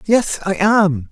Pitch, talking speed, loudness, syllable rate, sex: 185 Hz, 160 wpm, -16 LUFS, 3.1 syllables/s, male